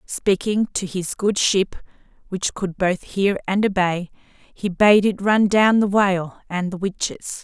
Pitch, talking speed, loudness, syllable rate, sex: 195 Hz, 170 wpm, -20 LUFS, 3.8 syllables/s, female